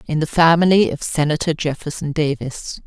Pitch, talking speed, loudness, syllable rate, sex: 155 Hz, 145 wpm, -18 LUFS, 5.2 syllables/s, female